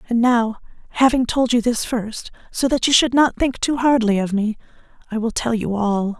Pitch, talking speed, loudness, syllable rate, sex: 235 Hz, 215 wpm, -19 LUFS, 4.9 syllables/s, female